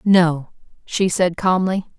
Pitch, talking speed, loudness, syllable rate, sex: 180 Hz, 120 wpm, -18 LUFS, 3.4 syllables/s, female